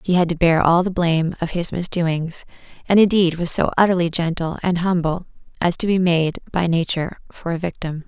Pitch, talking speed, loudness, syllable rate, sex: 170 Hz, 200 wpm, -19 LUFS, 5.4 syllables/s, female